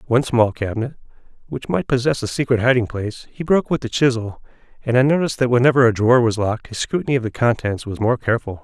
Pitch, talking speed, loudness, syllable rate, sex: 120 Hz, 220 wpm, -19 LUFS, 7.0 syllables/s, male